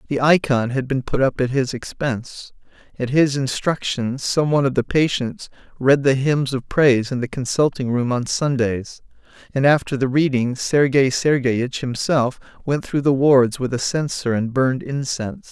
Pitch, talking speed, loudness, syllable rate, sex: 135 Hz, 175 wpm, -19 LUFS, 4.7 syllables/s, male